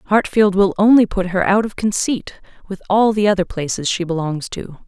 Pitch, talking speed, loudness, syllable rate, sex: 195 Hz, 195 wpm, -17 LUFS, 5.0 syllables/s, female